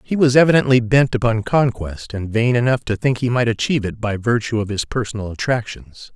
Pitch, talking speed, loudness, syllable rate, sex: 115 Hz, 205 wpm, -18 LUFS, 5.6 syllables/s, male